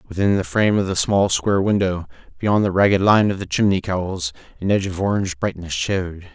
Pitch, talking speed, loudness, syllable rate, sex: 95 Hz, 210 wpm, -19 LUFS, 6.0 syllables/s, male